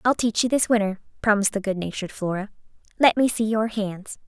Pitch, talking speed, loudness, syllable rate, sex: 210 Hz, 195 wpm, -23 LUFS, 6.1 syllables/s, female